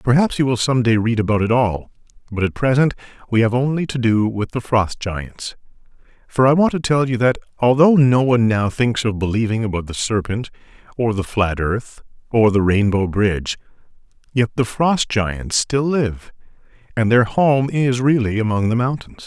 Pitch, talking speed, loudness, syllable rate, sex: 120 Hz, 185 wpm, -18 LUFS, 4.9 syllables/s, male